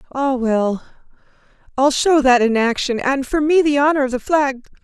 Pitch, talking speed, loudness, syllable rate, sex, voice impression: 270 Hz, 185 wpm, -17 LUFS, 4.9 syllables/s, female, very feminine, adult-like, slightly middle-aged, very thin, slightly relaxed, slightly weak, bright, soft, clear, slightly fluent, slightly raspy, slightly cool, very intellectual, refreshing, sincere, slightly calm, friendly, reassuring, slightly unique, slightly elegant, slightly wild, lively, kind, slightly modest